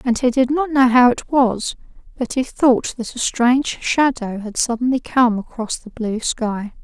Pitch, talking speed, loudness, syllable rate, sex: 245 Hz, 195 wpm, -18 LUFS, 4.3 syllables/s, female